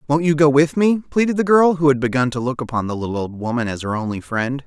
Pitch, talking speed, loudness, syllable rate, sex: 140 Hz, 285 wpm, -18 LUFS, 6.3 syllables/s, male